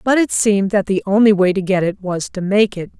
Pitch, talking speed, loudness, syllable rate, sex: 200 Hz, 280 wpm, -16 LUFS, 5.7 syllables/s, female